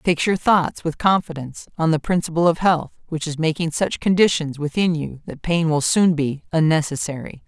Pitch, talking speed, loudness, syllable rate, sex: 160 Hz, 185 wpm, -20 LUFS, 5.1 syllables/s, female